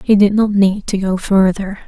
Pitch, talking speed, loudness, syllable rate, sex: 200 Hz, 225 wpm, -14 LUFS, 4.7 syllables/s, female